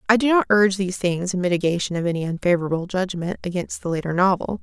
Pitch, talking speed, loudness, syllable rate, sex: 185 Hz, 205 wpm, -21 LUFS, 6.9 syllables/s, female